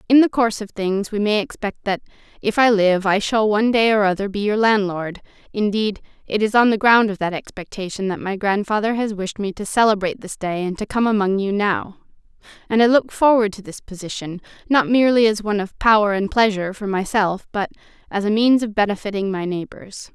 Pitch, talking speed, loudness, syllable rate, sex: 205 Hz, 210 wpm, -19 LUFS, 5.7 syllables/s, female